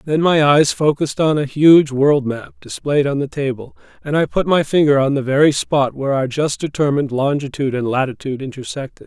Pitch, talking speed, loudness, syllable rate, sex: 140 Hz, 200 wpm, -17 LUFS, 5.7 syllables/s, male